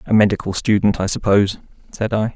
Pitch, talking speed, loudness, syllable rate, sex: 105 Hz, 180 wpm, -18 LUFS, 6.2 syllables/s, male